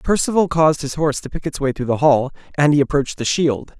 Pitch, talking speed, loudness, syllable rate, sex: 145 Hz, 255 wpm, -18 LUFS, 6.4 syllables/s, male